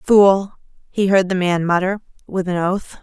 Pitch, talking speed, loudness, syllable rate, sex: 190 Hz, 180 wpm, -17 LUFS, 4.3 syllables/s, female